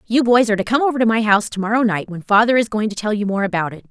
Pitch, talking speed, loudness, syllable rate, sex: 215 Hz, 320 wpm, -17 LUFS, 7.5 syllables/s, female